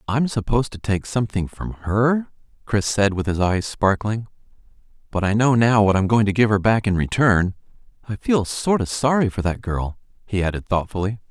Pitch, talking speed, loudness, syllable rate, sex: 105 Hz, 195 wpm, -21 LUFS, 5.2 syllables/s, male